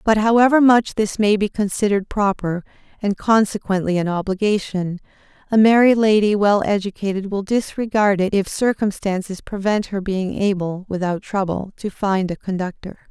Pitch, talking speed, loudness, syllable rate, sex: 200 Hz, 145 wpm, -19 LUFS, 5.0 syllables/s, female